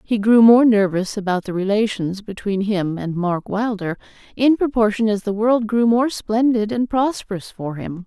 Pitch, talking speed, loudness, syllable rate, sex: 215 Hz, 180 wpm, -19 LUFS, 4.6 syllables/s, female